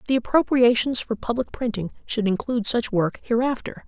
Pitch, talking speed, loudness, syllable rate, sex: 235 Hz, 155 wpm, -22 LUFS, 5.4 syllables/s, female